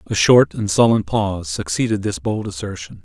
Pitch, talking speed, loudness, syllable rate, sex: 95 Hz, 180 wpm, -18 LUFS, 5.2 syllables/s, male